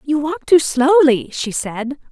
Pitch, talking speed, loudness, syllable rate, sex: 285 Hz, 170 wpm, -16 LUFS, 4.1 syllables/s, female